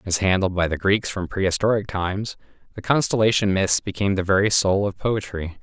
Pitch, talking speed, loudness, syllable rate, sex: 100 Hz, 180 wpm, -21 LUFS, 5.7 syllables/s, male